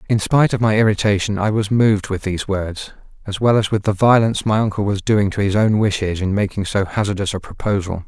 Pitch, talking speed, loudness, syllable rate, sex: 100 Hz, 230 wpm, -18 LUFS, 6.1 syllables/s, male